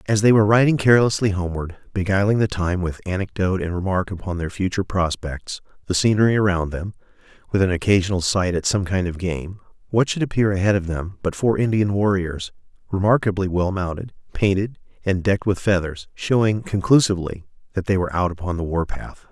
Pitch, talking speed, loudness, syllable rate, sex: 95 Hz, 180 wpm, -21 LUFS, 6.0 syllables/s, male